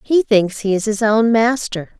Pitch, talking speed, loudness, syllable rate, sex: 220 Hz, 210 wpm, -16 LUFS, 4.4 syllables/s, female